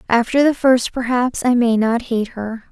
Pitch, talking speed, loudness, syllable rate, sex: 240 Hz, 200 wpm, -17 LUFS, 4.4 syllables/s, female